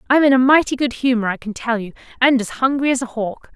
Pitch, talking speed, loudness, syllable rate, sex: 250 Hz, 285 wpm, -18 LUFS, 6.6 syllables/s, female